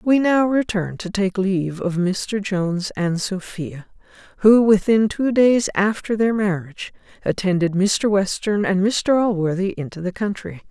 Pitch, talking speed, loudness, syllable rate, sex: 200 Hz, 150 wpm, -20 LUFS, 4.3 syllables/s, female